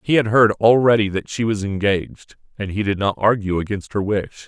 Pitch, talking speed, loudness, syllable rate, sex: 105 Hz, 215 wpm, -19 LUFS, 5.4 syllables/s, male